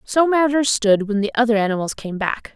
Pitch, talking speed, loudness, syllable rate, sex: 230 Hz, 210 wpm, -19 LUFS, 5.4 syllables/s, female